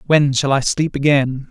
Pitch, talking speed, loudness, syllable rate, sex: 140 Hz, 200 wpm, -16 LUFS, 4.4 syllables/s, male